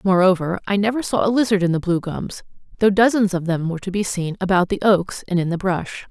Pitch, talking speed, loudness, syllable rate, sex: 190 Hz, 245 wpm, -19 LUFS, 5.8 syllables/s, female